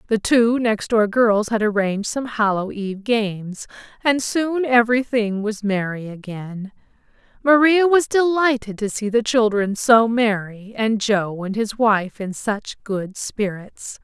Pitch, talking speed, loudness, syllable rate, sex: 220 Hz, 150 wpm, -19 LUFS, 4.0 syllables/s, female